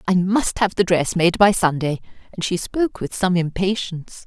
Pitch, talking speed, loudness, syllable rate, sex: 185 Hz, 195 wpm, -20 LUFS, 5.1 syllables/s, female